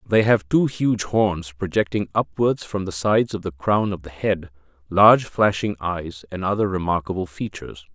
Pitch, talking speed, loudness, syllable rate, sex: 95 Hz, 175 wpm, -21 LUFS, 5.0 syllables/s, male